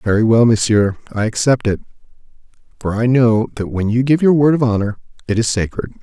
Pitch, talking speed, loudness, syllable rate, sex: 115 Hz, 200 wpm, -16 LUFS, 5.7 syllables/s, male